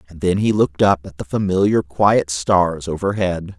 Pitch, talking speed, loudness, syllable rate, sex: 90 Hz, 185 wpm, -18 LUFS, 4.7 syllables/s, male